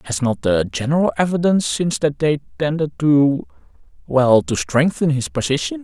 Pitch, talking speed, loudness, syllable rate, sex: 140 Hz, 145 wpm, -18 LUFS, 5.2 syllables/s, male